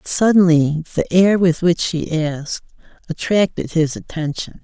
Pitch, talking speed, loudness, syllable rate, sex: 170 Hz, 130 wpm, -17 LUFS, 4.2 syllables/s, female